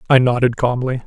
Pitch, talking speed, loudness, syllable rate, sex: 125 Hz, 170 wpm, -17 LUFS, 6.0 syllables/s, male